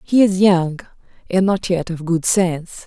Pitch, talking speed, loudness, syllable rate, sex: 180 Hz, 190 wpm, -17 LUFS, 4.4 syllables/s, female